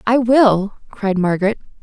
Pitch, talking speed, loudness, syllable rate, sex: 215 Hz, 130 wpm, -16 LUFS, 4.5 syllables/s, female